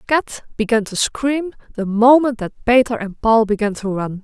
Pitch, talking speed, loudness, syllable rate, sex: 230 Hz, 185 wpm, -17 LUFS, 4.5 syllables/s, female